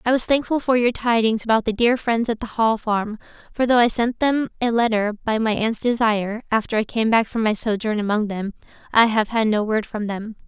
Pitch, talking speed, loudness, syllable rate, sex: 225 Hz, 235 wpm, -20 LUFS, 5.4 syllables/s, female